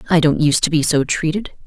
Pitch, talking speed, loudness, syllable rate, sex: 160 Hz, 250 wpm, -17 LUFS, 6.4 syllables/s, female